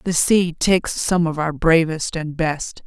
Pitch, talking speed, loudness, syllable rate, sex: 165 Hz, 190 wpm, -19 LUFS, 4.0 syllables/s, female